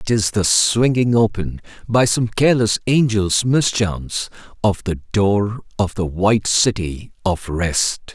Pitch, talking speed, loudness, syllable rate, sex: 105 Hz, 140 wpm, -18 LUFS, 4.0 syllables/s, male